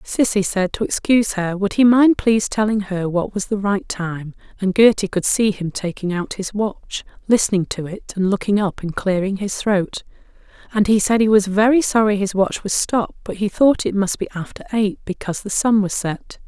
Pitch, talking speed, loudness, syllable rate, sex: 200 Hz, 215 wpm, -19 LUFS, 5.1 syllables/s, female